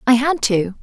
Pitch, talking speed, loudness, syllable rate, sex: 240 Hz, 215 wpm, -17 LUFS, 4.6 syllables/s, female